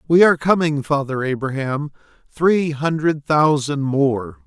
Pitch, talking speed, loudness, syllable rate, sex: 150 Hz, 120 wpm, -18 LUFS, 4.1 syllables/s, male